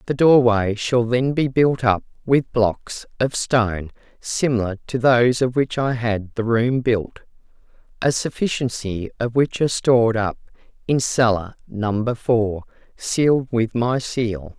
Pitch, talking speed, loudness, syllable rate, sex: 120 Hz, 150 wpm, -20 LUFS, 4.1 syllables/s, female